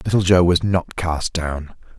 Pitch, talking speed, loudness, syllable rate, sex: 85 Hz, 180 wpm, -19 LUFS, 4.1 syllables/s, male